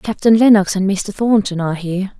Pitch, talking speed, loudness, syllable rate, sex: 200 Hz, 190 wpm, -15 LUFS, 5.6 syllables/s, female